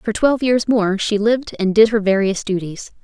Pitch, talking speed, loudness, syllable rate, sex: 215 Hz, 220 wpm, -17 LUFS, 5.1 syllables/s, female